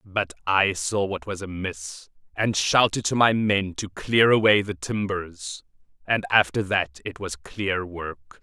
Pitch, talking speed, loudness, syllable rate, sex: 95 Hz, 165 wpm, -23 LUFS, 3.8 syllables/s, male